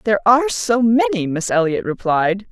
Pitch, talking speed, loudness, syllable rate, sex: 195 Hz, 165 wpm, -17 LUFS, 5.8 syllables/s, female